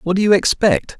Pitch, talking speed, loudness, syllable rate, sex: 180 Hz, 240 wpm, -15 LUFS, 5.3 syllables/s, male